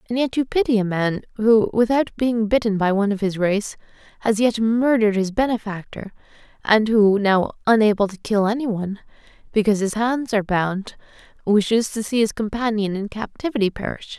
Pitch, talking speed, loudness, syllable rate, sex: 215 Hz, 175 wpm, -20 LUFS, 5.5 syllables/s, female